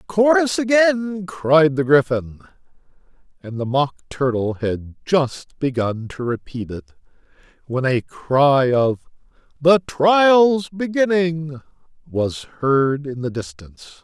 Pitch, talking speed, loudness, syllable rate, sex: 150 Hz, 115 wpm, -19 LUFS, 3.4 syllables/s, male